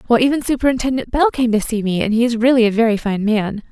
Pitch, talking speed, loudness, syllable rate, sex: 235 Hz, 245 wpm, -16 LUFS, 6.4 syllables/s, female